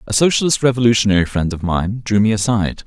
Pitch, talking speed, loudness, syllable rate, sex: 110 Hz, 190 wpm, -16 LUFS, 6.7 syllables/s, male